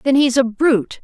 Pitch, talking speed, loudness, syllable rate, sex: 260 Hz, 235 wpm, -16 LUFS, 5.4 syllables/s, female